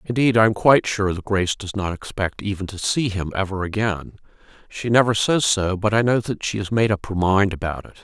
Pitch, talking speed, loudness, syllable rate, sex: 100 Hz, 240 wpm, -21 LUFS, 5.7 syllables/s, male